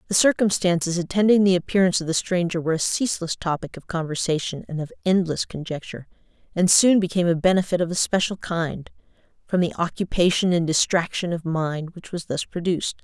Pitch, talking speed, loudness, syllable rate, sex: 175 Hz, 175 wpm, -22 LUFS, 6.0 syllables/s, female